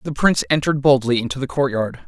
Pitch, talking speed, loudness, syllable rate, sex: 135 Hz, 200 wpm, -19 LUFS, 7.0 syllables/s, male